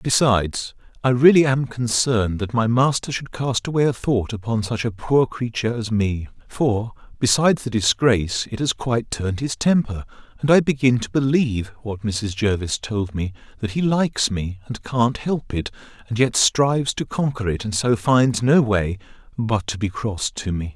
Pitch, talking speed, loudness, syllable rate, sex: 115 Hz, 190 wpm, -21 LUFS, 4.8 syllables/s, male